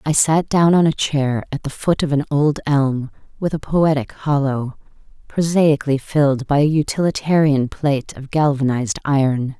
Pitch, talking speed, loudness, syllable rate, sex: 145 Hz, 165 wpm, -18 LUFS, 4.8 syllables/s, female